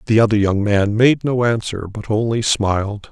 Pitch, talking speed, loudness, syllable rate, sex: 110 Hz, 195 wpm, -17 LUFS, 4.9 syllables/s, male